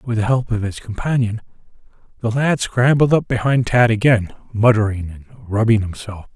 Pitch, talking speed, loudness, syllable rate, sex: 115 Hz, 160 wpm, -18 LUFS, 5.1 syllables/s, male